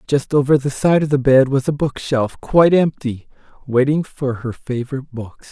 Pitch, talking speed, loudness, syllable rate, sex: 135 Hz, 195 wpm, -17 LUFS, 5.0 syllables/s, male